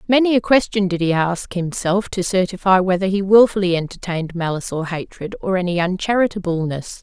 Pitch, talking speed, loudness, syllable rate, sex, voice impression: 185 Hz, 160 wpm, -18 LUFS, 5.7 syllables/s, female, feminine, adult-like, fluent, intellectual, slightly elegant